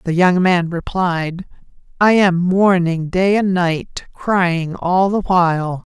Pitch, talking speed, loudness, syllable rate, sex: 180 Hz, 140 wpm, -16 LUFS, 3.3 syllables/s, female